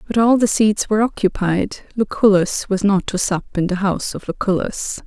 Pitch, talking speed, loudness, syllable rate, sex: 200 Hz, 190 wpm, -18 LUFS, 5.1 syllables/s, female